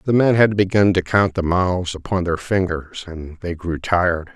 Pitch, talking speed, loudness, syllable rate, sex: 90 Hz, 205 wpm, -19 LUFS, 4.9 syllables/s, male